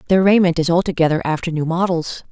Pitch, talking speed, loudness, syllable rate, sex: 170 Hz, 180 wpm, -17 LUFS, 6.3 syllables/s, female